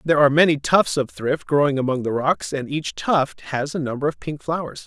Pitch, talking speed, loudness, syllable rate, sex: 140 Hz, 235 wpm, -21 LUFS, 5.5 syllables/s, male